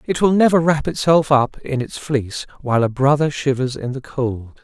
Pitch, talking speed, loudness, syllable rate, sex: 140 Hz, 205 wpm, -18 LUFS, 5.1 syllables/s, male